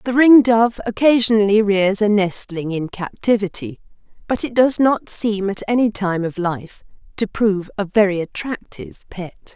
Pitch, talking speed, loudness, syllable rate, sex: 205 Hz, 150 wpm, -17 LUFS, 4.7 syllables/s, female